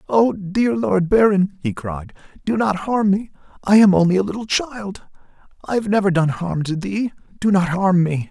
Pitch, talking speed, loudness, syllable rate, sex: 190 Hz, 195 wpm, -18 LUFS, 4.7 syllables/s, male